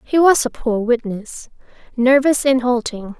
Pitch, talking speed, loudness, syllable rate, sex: 250 Hz, 150 wpm, -17 LUFS, 4.2 syllables/s, female